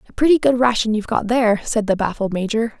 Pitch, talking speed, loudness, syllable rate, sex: 225 Hz, 255 wpm, -18 LUFS, 6.8 syllables/s, female